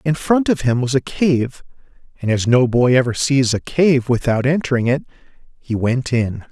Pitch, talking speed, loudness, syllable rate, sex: 130 Hz, 195 wpm, -17 LUFS, 4.7 syllables/s, male